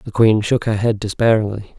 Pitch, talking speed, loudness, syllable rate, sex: 110 Hz, 200 wpm, -17 LUFS, 5.1 syllables/s, male